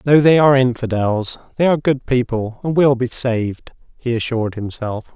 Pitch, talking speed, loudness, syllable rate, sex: 125 Hz, 175 wpm, -17 LUFS, 5.3 syllables/s, male